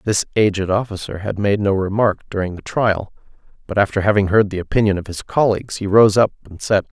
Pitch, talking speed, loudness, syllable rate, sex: 100 Hz, 205 wpm, -18 LUFS, 5.9 syllables/s, male